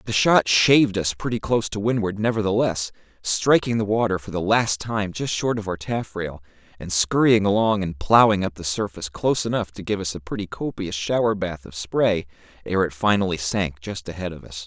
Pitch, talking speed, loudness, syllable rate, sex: 100 Hz, 200 wpm, -22 LUFS, 5.4 syllables/s, male